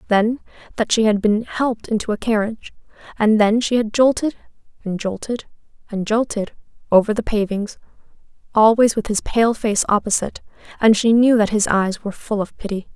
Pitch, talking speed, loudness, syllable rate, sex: 220 Hz, 170 wpm, -19 LUFS, 5.5 syllables/s, female